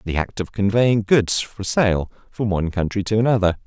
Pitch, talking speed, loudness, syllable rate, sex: 100 Hz, 195 wpm, -20 LUFS, 5.1 syllables/s, male